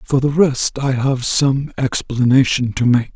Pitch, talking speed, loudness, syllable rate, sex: 130 Hz, 170 wpm, -16 LUFS, 4.0 syllables/s, male